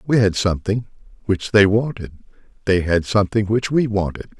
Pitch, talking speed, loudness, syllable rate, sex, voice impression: 105 Hz, 165 wpm, -19 LUFS, 5.6 syllables/s, male, very masculine, very middle-aged, very thick, very tensed, very powerful, bright, very soft, very muffled, fluent, raspy, very cool, intellectual, slightly refreshing, sincere, very calm, friendly, very reassuring, very unique, elegant, very wild, sweet, lively, kind, slightly intense